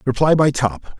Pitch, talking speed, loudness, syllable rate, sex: 130 Hz, 180 wpm, -17 LUFS, 4.7 syllables/s, male